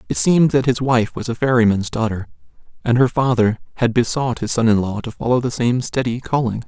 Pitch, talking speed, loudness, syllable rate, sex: 120 Hz, 215 wpm, -18 LUFS, 5.8 syllables/s, male